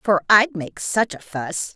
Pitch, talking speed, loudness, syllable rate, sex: 190 Hz, 205 wpm, -20 LUFS, 3.6 syllables/s, female